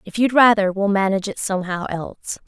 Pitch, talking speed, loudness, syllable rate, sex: 200 Hz, 195 wpm, -19 LUFS, 6.1 syllables/s, female